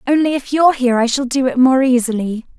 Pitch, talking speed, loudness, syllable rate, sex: 260 Hz, 230 wpm, -15 LUFS, 6.5 syllables/s, female